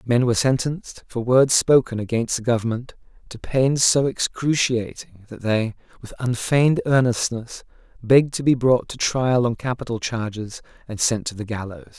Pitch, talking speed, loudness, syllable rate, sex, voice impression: 120 Hz, 160 wpm, -21 LUFS, 4.9 syllables/s, male, very masculine, very adult-like, very middle-aged, thick, slightly relaxed, slightly weak, slightly dark, slightly soft, slightly clear, slightly fluent, cool, intellectual, sincere, calm, slightly friendly, reassuring, slightly unique, slightly elegant, slightly sweet, kind, modest